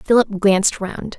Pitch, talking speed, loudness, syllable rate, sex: 205 Hz, 150 wpm, -18 LUFS, 4.6 syllables/s, female